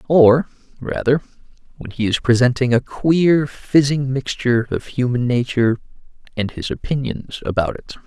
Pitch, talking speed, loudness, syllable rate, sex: 130 Hz, 135 wpm, -18 LUFS, 4.8 syllables/s, male